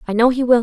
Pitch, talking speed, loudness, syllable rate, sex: 240 Hz, 380 wpm, -16 LUFS, 7.7 syllables/s, female